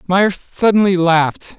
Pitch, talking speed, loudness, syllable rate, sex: 185 Hz, 115 wpm, -15 LUFS, 4.2 syllables/s, male